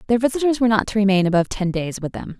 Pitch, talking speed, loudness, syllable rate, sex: 205 Hz, 275 wpm, -19 LUFS, 7.9 syllables/s, female